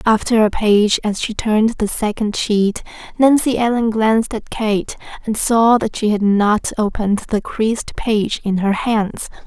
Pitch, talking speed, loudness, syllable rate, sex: 215 Hz, 170 wpm, -17 LUFS, 4.2 syllables/s, female